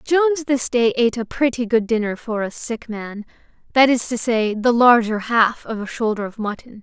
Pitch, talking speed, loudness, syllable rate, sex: 235 Hz, 210 wpm, -19 LUFS, 4.8 syllables/s, female